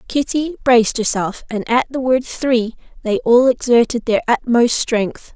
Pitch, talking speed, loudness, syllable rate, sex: 240 Hz, 155 wpm, -16 LUFS, 4.4 syllables/s, female